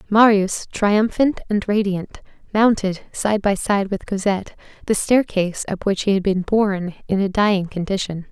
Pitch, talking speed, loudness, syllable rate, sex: 200 Hz, 160 wpm, -19 LUFS, 4.7 syllables/s, female